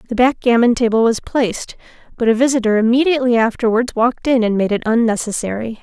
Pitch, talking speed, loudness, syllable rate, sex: 235 Hz, 165 wpm, -16 LUFS, 6.4 syllables/s, female